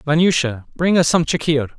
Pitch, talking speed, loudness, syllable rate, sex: 155 Hz, 170 wpm, -17 LUFS, 5.1 syllables/s, male